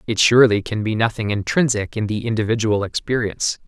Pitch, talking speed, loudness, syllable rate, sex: 110 Hz, 165 wpm, -19 LUFS, 6.1 syllables/s, male